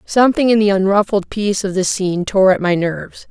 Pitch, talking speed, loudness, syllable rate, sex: 195 Hz, 220 wpm, -15 LUFS, 5.9 syllables/s, female